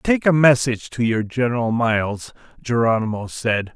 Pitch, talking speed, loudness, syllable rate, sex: 120 Hz, 145 wpm, -19 LUFS, 5.0 syllables/s, male